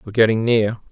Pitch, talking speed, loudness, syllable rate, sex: 110 Hz, 195 wpm, -17 LUFS, 6.9 syllables/s, male